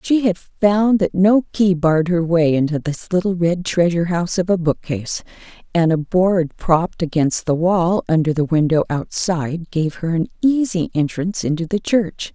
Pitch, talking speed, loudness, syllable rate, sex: 175 Hz, 180 wpm, -18 LUFS, 5.0 syllables/s, female